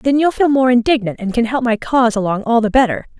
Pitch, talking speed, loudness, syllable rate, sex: 240 Hz, 265 wpm, -15 LUFS, 6.2 syllables/s, female